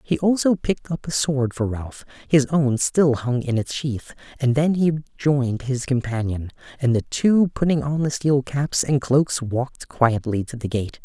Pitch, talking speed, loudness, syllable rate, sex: 135 Hz, 185 wpm, -21 LUFS, 4.4 syllables/s, male